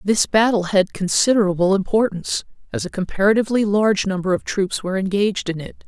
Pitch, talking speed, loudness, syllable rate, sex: 200 Hz, 165 wpm, -19 LUFS, 6.2 syllables/s, female